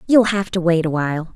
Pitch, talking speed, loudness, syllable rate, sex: 180 Hz, 220 wpm, -18 LUFS, 6.0 syllables/s, female